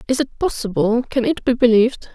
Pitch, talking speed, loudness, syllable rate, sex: 245 Hz, 195 wpm, -18 LUFS, 5.7 syllables/s, female